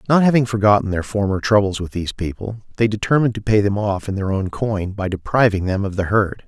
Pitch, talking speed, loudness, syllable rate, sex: 105 Hz, 230 wpm, -19 LUFS, 6.0 syllables/s, male